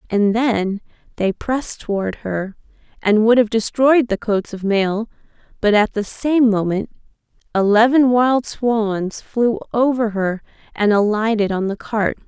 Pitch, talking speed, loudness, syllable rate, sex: 220 Hz, 145 wpm, -18 LUFS, 4.1 syllables/s, female